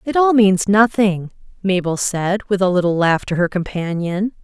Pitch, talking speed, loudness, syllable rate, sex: 195 Hz, 175 wpm, -17 LUFS, 4.5 syllables/s, female